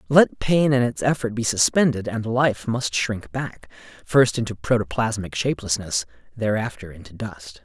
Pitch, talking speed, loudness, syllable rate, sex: 110 Hz, 150 wpm, -22 LUFS, 4.7 syllables/s, male